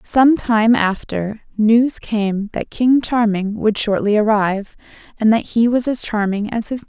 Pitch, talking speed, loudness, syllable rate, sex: 220 Hz, 175 wpm, -17 LUFS, 4.2 syllables/s, female